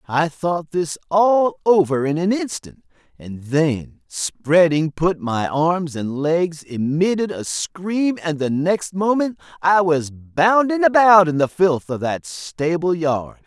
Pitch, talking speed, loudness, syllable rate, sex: 165 Hz, 150 wpm, -19 LUFS, 3.5 syllables/s, male